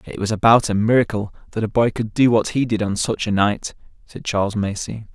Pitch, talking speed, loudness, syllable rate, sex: 110 Hz, 235 wpm, -19 LUFS, 5.6 syllables/s, male